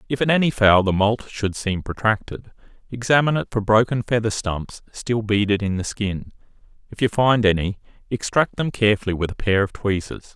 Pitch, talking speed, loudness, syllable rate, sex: 110 Hz, 185 wpm, -21 LUFS, 5.4 syllables/s, male